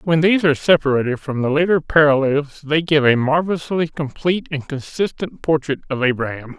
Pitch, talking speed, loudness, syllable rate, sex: 150 Hz, 165 wpm, -18 LUFS, 5.7 syllables/s, male